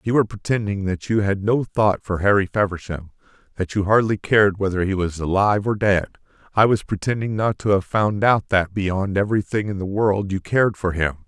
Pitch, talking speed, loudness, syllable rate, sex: 100 Hz, 210 wpm, -20 LUFS, 5.5 syllables/s, male